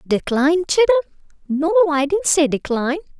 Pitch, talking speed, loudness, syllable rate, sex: 290 Hz, 95 wpm, -18 LUFS, 6.0 syllables/s, female